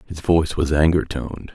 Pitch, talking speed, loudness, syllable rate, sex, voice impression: 80 Hz, 195 wpm, -20 LUFS, 5.7 syllables/s, male, masculine, adult-like, relaxed, slightly weak, dark, soft, slightly muffled, cool, calm, mature, wild, lively, strict, modest